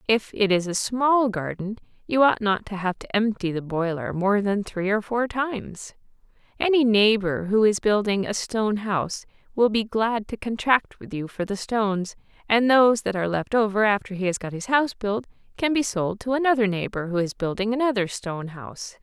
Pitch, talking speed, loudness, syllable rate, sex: 210 Hz, 200 wpm, -23 LUFS, 5.2 syllables/s, female